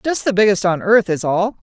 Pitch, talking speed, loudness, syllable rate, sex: 200 Hz, 245 wpm, -16 LUFS, 5.4 syllables/s, female